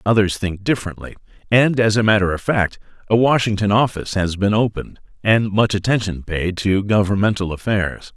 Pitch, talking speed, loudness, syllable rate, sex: 105 Hz, 160 wpm, -18 LUFS, 5.5 syllables/s, male